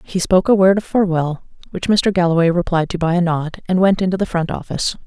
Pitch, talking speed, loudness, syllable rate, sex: 180 Hz, 235 wpm, -17 LUFS, 6.4 syllables/s, female